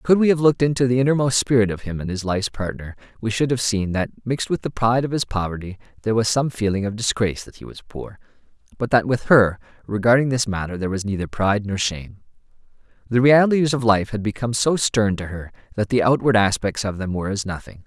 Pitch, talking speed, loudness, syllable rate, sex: 110 Hz, 230 wpm, -20 LUFS, 6.5 syllables/s, male